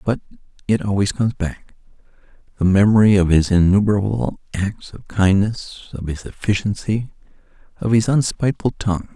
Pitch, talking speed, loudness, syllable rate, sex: 100 Hz, 125 wpm, -19 LUFS, 5.4 syllables/s, male